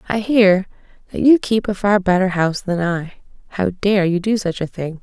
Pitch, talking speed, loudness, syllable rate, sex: 195 Hz, 215 wpm, -17 LUFS, 5.0 syllables/s, female